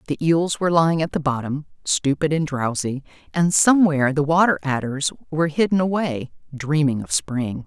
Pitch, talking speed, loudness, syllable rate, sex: 150 Hz, 165 wpm, -20 LUFS, 5.3 syllables/s, female